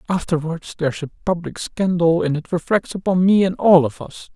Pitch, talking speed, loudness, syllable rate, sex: 175 Hz, 205 wpm, -19 LUFS, 5.4 syllables/s, male